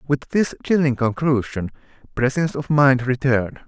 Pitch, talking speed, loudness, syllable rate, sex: 135 Hz, 130 wpm, -20 LUFS, 5.0 syllables/s, male